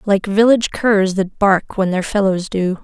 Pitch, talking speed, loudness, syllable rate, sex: 200 Hz, 190 wpm, -16 LUFS, 4.6 syllables/s, female